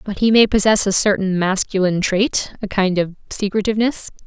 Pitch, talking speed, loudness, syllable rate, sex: 200 Hz, 170 wpm, -17 LUFS, 5.5 syllables/s, female